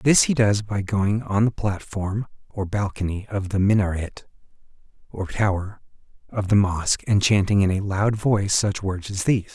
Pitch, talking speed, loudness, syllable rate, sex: 100 Hz, 175 wpm, -22 LUFS, 4.7 syllables/s, male